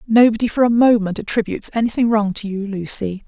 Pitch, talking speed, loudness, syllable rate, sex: 215 Hz, 185 wpm, -17 LUFS, 6.1 syllables/s, female